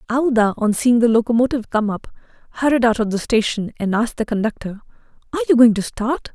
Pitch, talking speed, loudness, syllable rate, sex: 230 Hz, 200 wpm, -18 LUFS, 6.7 syllables/s, female